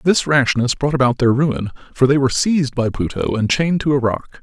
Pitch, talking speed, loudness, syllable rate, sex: 135 Hz, 230 wpm, -17 LUFS, 5.6 syllables/s, male